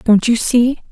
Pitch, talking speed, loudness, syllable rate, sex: 235 Hz, 195 wpm, -14 LUFS, 4.2 syllables/s, female